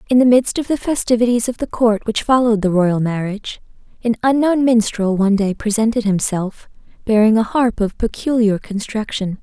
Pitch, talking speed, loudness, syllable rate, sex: 220 Hz, 170 wpm, -17 LUFS, 5.4 syllables/s, female